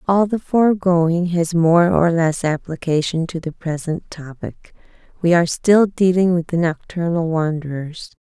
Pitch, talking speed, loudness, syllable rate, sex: 170 Hz, 145 wpm, -18 LUFS, 4.4 syllables/s, female